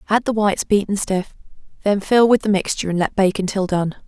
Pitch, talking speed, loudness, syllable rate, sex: 200 Hz, 220 wpm, -19 LUFS, 5.9 syllables/s, female